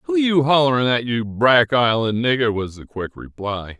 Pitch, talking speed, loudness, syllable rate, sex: 115 Hz, 190 wpm, -18 LUFS, 4.4 syllables/s, male